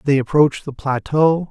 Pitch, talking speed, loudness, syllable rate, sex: 140 Hz, 160 wpm, -17 LUFS, 5.1 syllables/s, male